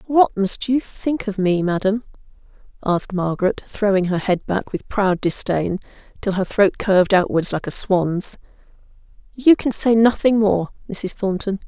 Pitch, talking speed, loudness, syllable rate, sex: 200 Hz, 160 wpm, -19 LUFS, 4.5 syllables/s, female